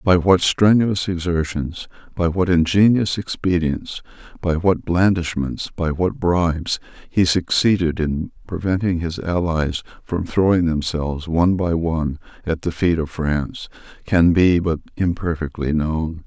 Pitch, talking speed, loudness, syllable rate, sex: 85 Hz, 135 wpm, -20 LUFS, 4.3 syllables/s, male